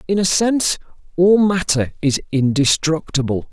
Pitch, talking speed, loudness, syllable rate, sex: 160 Hz, 120 wpm, -17 LUFS, 4.7 syllables/s, male